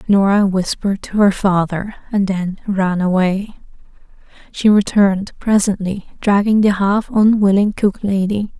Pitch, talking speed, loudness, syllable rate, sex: 195 Hz, 125 wpm, -16 LUFS, 4.4 syllables/s, female